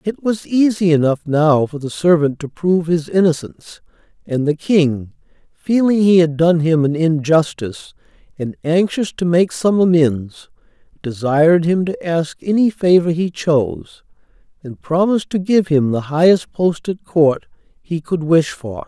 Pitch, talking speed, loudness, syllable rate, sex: 165 Hz, 160 wpm, -16 LUFS, 4.4 syllables/s, male